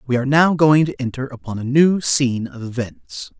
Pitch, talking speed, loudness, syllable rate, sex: 130 Hz, 210 wpm, -18 LUFS, 5.3 syllables/s, male